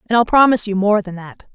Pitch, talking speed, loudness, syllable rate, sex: 210 Hz, 270 wpm, -15 LUFS, 6.6 syllables/s, female